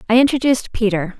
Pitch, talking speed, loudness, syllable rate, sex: 225 Hz, 150 wpm, -17 LUFS, 6.9 syllables/s, female